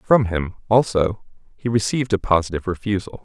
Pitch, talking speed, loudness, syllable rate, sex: 100 Hz, 150 wpm, -21 LUFS, 5.8 syllables/s, male